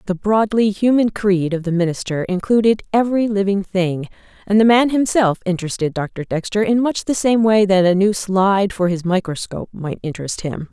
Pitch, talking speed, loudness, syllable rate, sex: 195 Hz, 185 wpm, -17 LUFS, 5.4 syllables/s, female